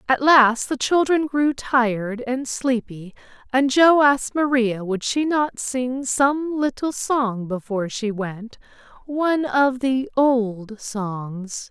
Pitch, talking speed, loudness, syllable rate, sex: 250 Hz, 140 wpm, -20 LUFS, 3.4 syllables/s, female